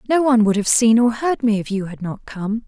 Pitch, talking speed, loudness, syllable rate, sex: 225 Hz, 290 wpm, -18 LUFS, 5.6 syllables/s, female